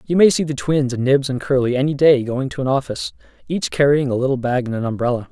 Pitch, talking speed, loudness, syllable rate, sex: 135 Hz, 260 wpm, -18 LUFS, 6.4 syllables/s, male